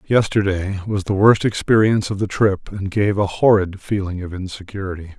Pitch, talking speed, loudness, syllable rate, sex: 100 Hz, 175 wpm, -19 LUFS, 5.4 syllables/s, male